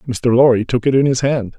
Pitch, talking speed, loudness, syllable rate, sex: 125 Hz, 265 wpm, -15 LUFS, 5.2 syllables/s, male